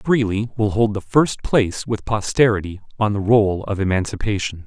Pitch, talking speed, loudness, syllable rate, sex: 105 Hz, 165 wpm, -19 LUFS, 5.1 syllables/s, male